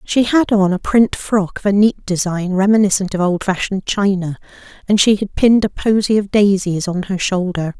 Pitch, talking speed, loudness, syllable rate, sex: 195 Hz, 190 wpm, -16 LUFS, 5.1 syllables/s, female